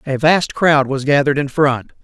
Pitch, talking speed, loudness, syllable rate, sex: 140 Hz, 205 wpm, -15 LUFS, 4.9 syllables/s, male